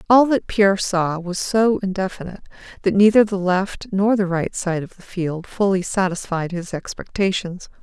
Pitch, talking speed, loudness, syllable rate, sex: 190 Hz, 170 wpm, -20 LUFS, 4.8 syllables/s, female